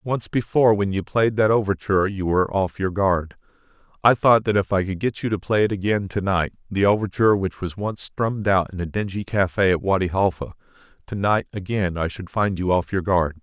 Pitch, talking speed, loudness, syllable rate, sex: 100 Hz, 215 wpm, -21 LUFS, 5.5 syllables/s, male